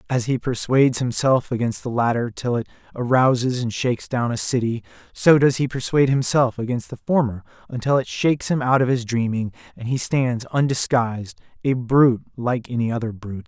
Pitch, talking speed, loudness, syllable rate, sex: 125 Hz, 185 wpm, -21 LUFS, 5.5 syllables/s, male